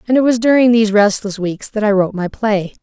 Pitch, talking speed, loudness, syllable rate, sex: 215 Hz, 255 wpm, -14 LUFS, 6.2 syllables/s, female